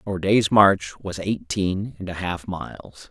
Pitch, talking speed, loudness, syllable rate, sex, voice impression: 95 Hz, 175 wpm, -22 LUFS, 3.7 syllables/s, male, very masculine, adult-like, slightly middle-aged, very thick, tensed, very powerful, slightly bright, hard, slightly muffled, very fluent, slightly raspy, cool, very intellectual, refreshing, very sincere, very calm, mature, friendly, reassuring, very unique, wild, slightly sweet, kind, modest